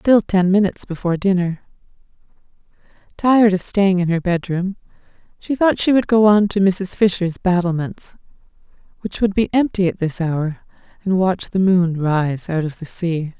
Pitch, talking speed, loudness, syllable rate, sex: 185 Hz, 165 wpm, -18 LUFS, 4.8 syllables/s, female